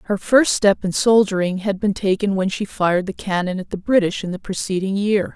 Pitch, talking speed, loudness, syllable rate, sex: 195 Hz, 225 wpm, -19 LUFS, 5.4 syllables/s, female